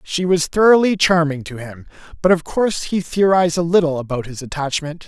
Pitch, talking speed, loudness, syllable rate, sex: 165 Hz, 190 wpm, -17 LUFS, 5.6 syllables/s, male